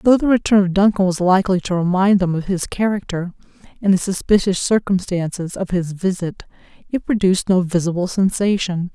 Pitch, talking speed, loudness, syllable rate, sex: 190 Hz, 170 wpm, -18 LUFS, 5.5 syllables/s, female